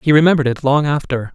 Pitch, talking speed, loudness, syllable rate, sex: 140 Hz, 225 wpm, -15 LUFS, 7.2 syllables/s, male